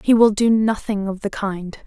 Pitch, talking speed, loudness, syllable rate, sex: 210 Hz, 225 wpm, -19 LUFS, 4.5 syllables/s, female